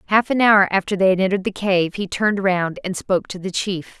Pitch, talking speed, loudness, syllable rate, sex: 190 Hz, 255 wpm, -19 LUFS, 5.8 syllables/s, female